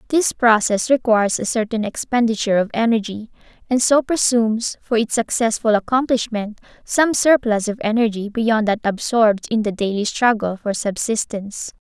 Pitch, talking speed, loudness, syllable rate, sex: 225 Hz, 140 wpm, -18 LUFS, 5.1 syllables/s, female